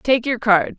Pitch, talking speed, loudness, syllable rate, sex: 230 Hz, 230 wpm, -17 LUFS, 4.0 syllables/s, female